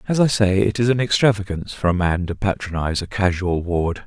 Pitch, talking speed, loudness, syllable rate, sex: 100 Hz, 220 wpm, -20 LUFS, 5.9 syllables/s, male